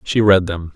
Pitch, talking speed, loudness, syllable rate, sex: 95 Hz, 240 wpm, -14 LUFS, 4.6 syllables/s, male